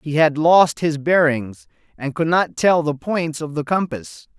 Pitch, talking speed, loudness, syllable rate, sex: 155 Hz, 190 wpm, -18 LUFS, 4.1 syllables/s, male